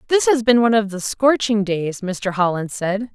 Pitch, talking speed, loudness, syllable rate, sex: 210 Hz, 210 wpm, -18 LUFS, 4.8 syllables/s, female